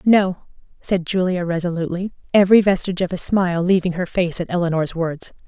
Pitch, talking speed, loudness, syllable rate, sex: 180 Hz, 165 wpm, -19 LUFS, 6.1 syllables/s, female